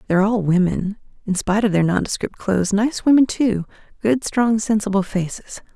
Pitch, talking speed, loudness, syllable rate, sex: 205 Hz, 165 wpm, -19 LUFS, 5.3 syllables/s, female